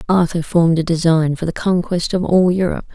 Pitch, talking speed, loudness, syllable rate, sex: 170 Hz, 205 wpm, -16 LUFS, 6.0 syllables/s, female